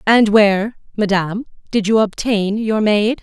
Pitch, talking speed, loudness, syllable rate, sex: 210 Hz, 150 wpm, -16 LUFS, 4.5 syllables/s, female